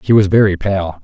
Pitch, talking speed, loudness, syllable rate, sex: 95 Hz, 230 wpm, -13 LUFS, 5.7 syllables/s, male